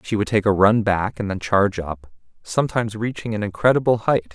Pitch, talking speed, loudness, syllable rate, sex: 105 Hz, 205 wpm, -20 LUFS, 5.9 syllables/s, male